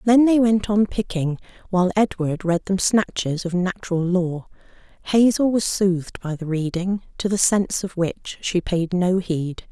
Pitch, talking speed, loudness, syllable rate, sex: 190 Hz, 175 wpm, -21 LUFS, 4.5 syllables/s, female